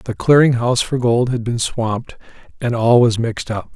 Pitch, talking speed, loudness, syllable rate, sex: 120 Hz, 210 wpm, -17 LUFS, 5.2 syllables/s, male